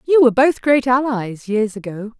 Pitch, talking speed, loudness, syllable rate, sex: 240 Hz, 190 wpm, -16 LUFS, 5.0 syllables/s, female